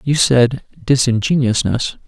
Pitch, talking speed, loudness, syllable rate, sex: 125 Hz, 85 wpm, -15 LUFS, 3.9 syllables/s, male